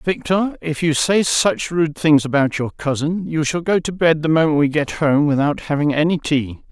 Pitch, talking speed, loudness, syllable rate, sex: 155 Hz, 215 wpm, -18 LUFS, 4.8 syllables/s, male